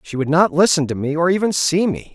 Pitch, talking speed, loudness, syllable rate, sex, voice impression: 165 Hz, 280 wpm, -17 LUFS, 5.9 syllables/s, male, masculine, adult-like, tensed, slightly powerful, bright, clear, cool, calm, friendly, wild, lively, kind